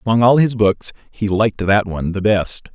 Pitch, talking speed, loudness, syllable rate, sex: 105 Hz, 220 wpm, -16 LUFS, 5.4 syllables/s, male